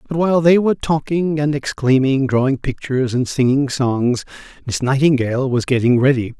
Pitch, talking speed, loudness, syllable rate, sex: 135 Hz, 160 wpm, -17 LUFS, 5.4 syllables/s, male